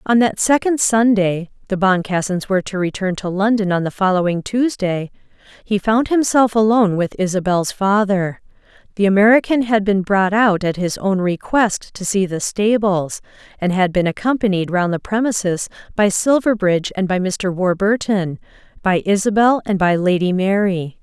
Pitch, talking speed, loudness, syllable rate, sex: 200 Hz, 150 wpm, -17 LUFS, 4.9 syllables/s, female